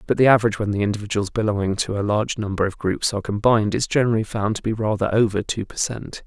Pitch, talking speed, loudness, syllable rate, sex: 105 Hz, 240 wpm, -21 LUFS, 7.1 syllables/s, male